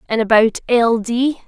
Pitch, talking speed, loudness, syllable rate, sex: 230 Hz, 165 wpm, -15 LUFS, 4.2 syllables/s, female